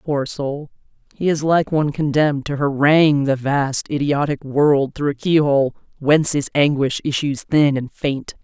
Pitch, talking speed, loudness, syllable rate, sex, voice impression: 145 Hz, 165 wpm, -18 LUFS, 4.7 syllables/s, female, slightly masculine, feminine, very gender-neutral, very adult-like, middle-aged, slightly thin, tensed, powerful, bright, hard, slightly muffled, fluent, slightly raspy, cool, intellectual, slightly refreshing, sincere, very calm, slightly mature, friendly, reassuring, slightly unique, slightly wild, slightly sweet, lively, kind